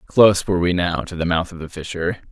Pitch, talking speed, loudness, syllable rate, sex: 90 Hz, 260 wpm, -19 LUFS, 6.7 syllables/s, male